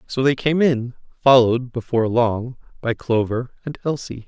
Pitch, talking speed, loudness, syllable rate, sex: 125 Hz, 155 wpm, -20 LUFS, 4.9 syllables/s, male